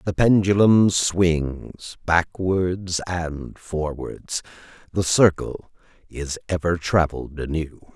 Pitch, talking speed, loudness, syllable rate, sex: 85 Hz, 90 wpm, -22 LUFS, 3.1 syllables/s, male